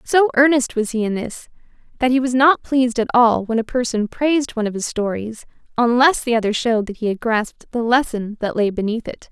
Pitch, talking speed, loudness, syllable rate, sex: 235 Hz, 225 wpm, -18 LUFS, 5.7 syllables/s, female